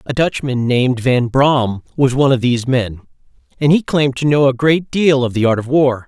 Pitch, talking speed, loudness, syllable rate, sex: 130 Hz, 245 wpm, -15 LUFS, 5.5 syllables/s, male